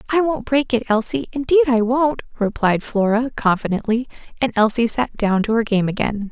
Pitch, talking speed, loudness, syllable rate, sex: 235 Hz, 180 wpm, -19 LUFS, 5.1 syllables/s, female